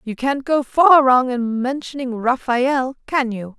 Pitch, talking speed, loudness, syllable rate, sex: 255 Hz, 170 wpm, -18 LUFS, 3.8 syllables/s, female